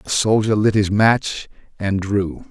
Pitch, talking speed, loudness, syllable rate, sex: 105 Hz, 170 wpm, -18 LUFS, 3.7 syllables/s, male